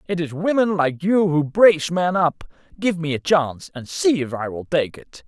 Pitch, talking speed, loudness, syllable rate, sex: 165 Hz, 230 wpm, -20 LUFS, 4.8 syllables/s, male